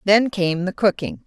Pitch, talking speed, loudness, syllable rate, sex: 190 Hz, 190 wpm, -20 LUFS, 4.4 syllables/s, female